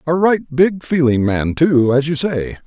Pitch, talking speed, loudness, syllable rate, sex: 145 Hz, 205 wpm, -16 LUFS, 4.1 syllables/s, male